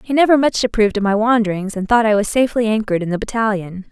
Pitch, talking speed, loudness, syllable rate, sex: 220 Hz, 245 wpm, -16 LUFS, 7.1 syllables/s, female